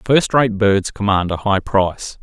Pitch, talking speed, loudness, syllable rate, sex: 105 Hz, 190 wpm, -17 LUFS, 4.3 syllables/s, male